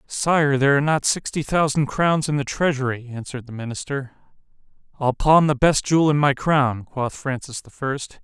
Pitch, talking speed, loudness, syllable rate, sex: 140 Hz, 175 wpm, -21 LUFS, 5.1 syllables/s, male